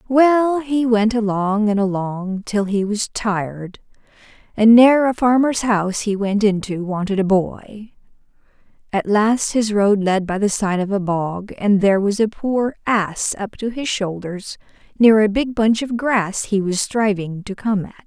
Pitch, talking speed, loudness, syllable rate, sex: 210 Hz, 180 wpm, -18 LUFS, 4.2 syllables/s, female